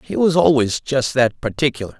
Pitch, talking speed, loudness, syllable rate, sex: 130 Hz, 180 wpm, -18 LUFS, 5.3 syllables/s, male